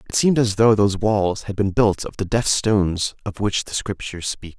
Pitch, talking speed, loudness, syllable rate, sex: 100 Hz, 235 wpm, -20 LUFS, 5.4 syllables/s, male